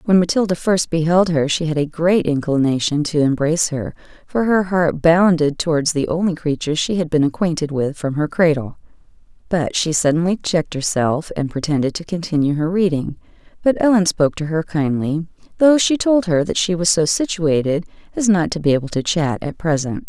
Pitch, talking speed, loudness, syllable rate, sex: 165 Hz, 190 wpm, -18 LUFS, 5.4 syllables/s, female